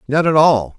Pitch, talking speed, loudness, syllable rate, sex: 150 Hz, 230 wpm, -14 LUFS, 4.8 syllables/s, male